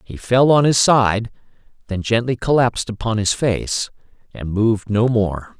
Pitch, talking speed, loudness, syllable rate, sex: 115 Hz, 160 wpm, -18 LUFS, 4.4 syllables/s, male